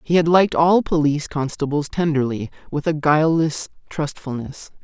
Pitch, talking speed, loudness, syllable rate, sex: 155 Hz, 135 wpm, -20 LUFS, 5.2 syllables/s, male